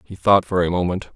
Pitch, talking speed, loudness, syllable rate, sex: 95 Hz, 260 wpm, -19 LUFS, 5.8 syllables/s, male